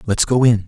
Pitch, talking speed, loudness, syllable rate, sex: 115 Hz, 270 wpm, -15 LUFS, 5.7 syllables/s, male